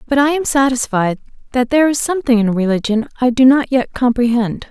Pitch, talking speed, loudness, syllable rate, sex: 250 Hz, 190 wpm, -15 LUFS, 6.0 syllables/s, female